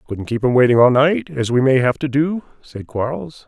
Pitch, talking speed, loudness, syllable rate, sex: 125 Hz, 240 wpm, -16 LUFS, 5.1 syllables/s, male